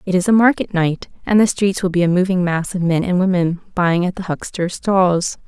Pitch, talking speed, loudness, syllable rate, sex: 185 Hz, 240 wpm, -17 LUFS, 5.2 syllables/s, female